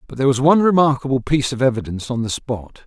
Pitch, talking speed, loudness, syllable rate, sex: 130 Hz, 230 wpm, -18 LUFS, 7.6 syllables/s, male